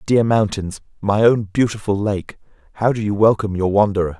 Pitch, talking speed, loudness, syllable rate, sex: 105 Hz, 170 wpm, -18 LUFS, 5.5 syllables/s, male